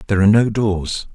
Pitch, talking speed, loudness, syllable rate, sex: 100 Hz, 210 wpm, -17 LUFS, 6.6 syllables/s, male